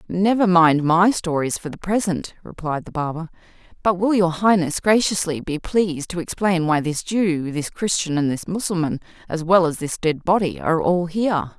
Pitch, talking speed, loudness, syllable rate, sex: 175 Hz, 185 wpm, -20 LUFS, 5.0 syllables/s, female